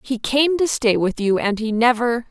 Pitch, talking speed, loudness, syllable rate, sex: 240 Hz, 235 wpm, -19 LUFS, 4.6 syllables/s, female